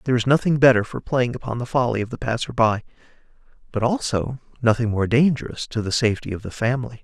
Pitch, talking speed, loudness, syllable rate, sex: 120 Hz, 205 wpm, -21 LUFS, 6.6 syllables/s, male